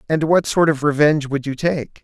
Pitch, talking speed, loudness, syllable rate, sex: 150 Hz, 235 wpm, -18 LUFS, 5.4 syllables/s, male